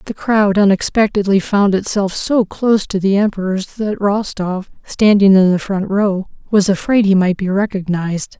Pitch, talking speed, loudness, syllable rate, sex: 200 Hz, 165 wpm, -15 LUFS, 4.7 syllables/s, female